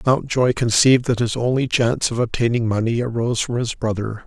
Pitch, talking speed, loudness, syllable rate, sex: 120 Hz, 185 wpm, -19 LUFS, 5.8 syllables/s, male